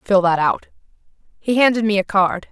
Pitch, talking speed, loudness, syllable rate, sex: 200 Hz, 190 wpm, -17 LUFS, 5.2 syllables/s, female